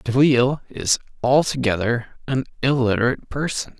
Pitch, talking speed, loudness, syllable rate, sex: 130 Hz, 95 wpm, -21 LUFS, 5.1 syllables/s, male